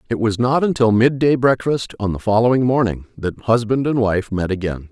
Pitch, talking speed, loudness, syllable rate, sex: 115 Hz, 210 wpm, -18 LUFS, 5.3 syllables/s, male